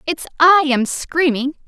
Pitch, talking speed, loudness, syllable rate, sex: 300 Hz, 145 wpm, -16 LUFS, 3.9 syllables/s, female